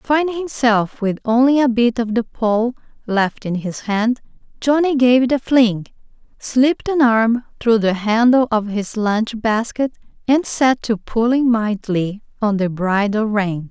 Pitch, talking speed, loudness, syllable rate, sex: 230 Hz, 160 wpm, -17 LUFS, 4.1 syllables/s, female